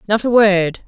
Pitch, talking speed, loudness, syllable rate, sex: 205 Hz, 205 wpm, -14 LUFS, 4.3 syllables/s, female